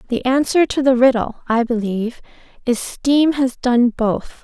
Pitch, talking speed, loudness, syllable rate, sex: 250 Hz, 150 wpm, -17 LUFS, 4.4 syllables/s, female